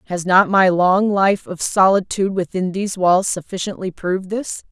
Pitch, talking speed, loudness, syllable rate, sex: 190 Hz, 165 wpm, -17 LUFS, 5.0 syllables/s, female